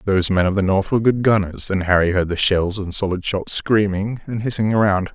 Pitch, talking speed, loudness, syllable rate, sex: 100 Hz, 235 wpm, -19 LUFS, 5.7 syllables/s, male